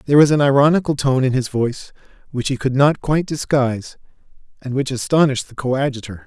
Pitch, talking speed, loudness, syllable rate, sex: 135 Hz, 180 wpm, -18 LUFS, 6.5 syllables/s, male